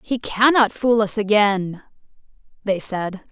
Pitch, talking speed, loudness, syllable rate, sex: 210 Hz, 125 wpm, -19 LUFS, 3.8 syllables/s, female